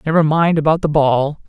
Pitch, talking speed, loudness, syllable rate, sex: 155 Hz, 205 wpm, -15 LUFS, 5.3 syllables/s, male